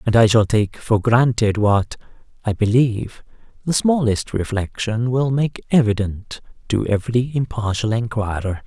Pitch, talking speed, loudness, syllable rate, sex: 115 Hz, 130 wpm, -19 LUFS, 4.5 syllables/s, male